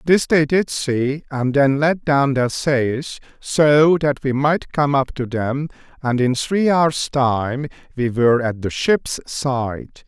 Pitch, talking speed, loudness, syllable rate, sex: 140 Hz, 175 wpm, -18 LUFS, 3.4 syllables/s, male